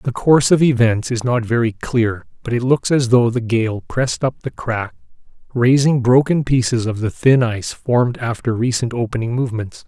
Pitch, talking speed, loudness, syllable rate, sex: 120 Hz, 190 wpm, -17 LUFS, 5.1 syllables/s, male